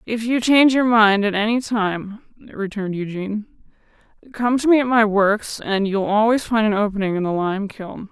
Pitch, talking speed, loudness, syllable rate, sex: 215 Hz, 190 wpm, -19 LUFS, 5.1 syllables/s, female